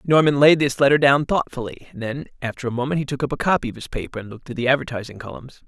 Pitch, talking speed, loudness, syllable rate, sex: 135 Hz, 265 wpm, -20 LUFS, 7.2 syllables/s, male